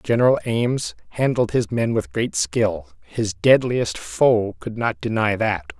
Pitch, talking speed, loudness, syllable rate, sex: 115 Hz, 155 wpm, -21 LUFS, 3.8 syllables/s, male